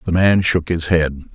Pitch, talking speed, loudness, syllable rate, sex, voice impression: 85 Hz, 225 wpm, -17 LUFS, 4.4 syllables/s, male, masculine, middle-aged, powerful, slightly hard, clear, slightly fluent, intellectual, calm, slightly mature, reassuring, wild, lively, slightly strict